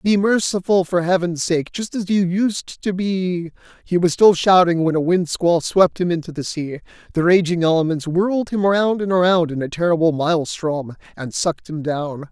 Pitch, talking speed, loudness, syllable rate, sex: 175 Hz, 190 wpm, -19 LUFS, 4.9 syllables/s, male